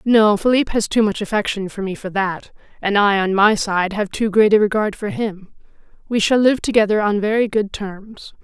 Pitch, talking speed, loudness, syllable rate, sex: 210 Hz, 215 wpm, -18 LUFS, 5.0 syllables/s, female